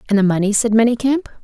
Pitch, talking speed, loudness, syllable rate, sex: 225 Hz, 210 wpm, -16 LUFS, 7.6 syllables/s, female